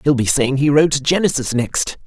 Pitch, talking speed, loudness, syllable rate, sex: 140 Hz, 205 wpm, -16 LUFS, 5.3 syllables/s, male